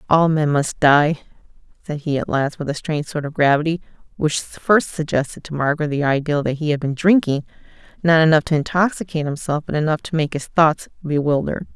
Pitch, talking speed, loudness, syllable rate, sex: 155 Hz, 190 wpm, -19 LUFS, 5.8 syllables/s, female